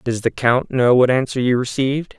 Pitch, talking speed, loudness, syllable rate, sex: 125 Hz, 220 wpm, -17 LUFS, 5.1 syllables/s, male